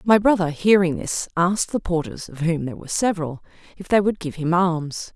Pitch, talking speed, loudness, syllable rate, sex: 175 Hz, 210 wpm, -21 LUFS, 5.6 syllables/s, female